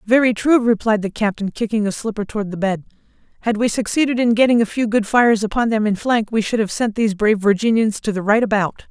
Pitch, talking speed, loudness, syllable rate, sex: 220 Hz, 235 wpm, -18 LUFS, 6.3 syllables/s, female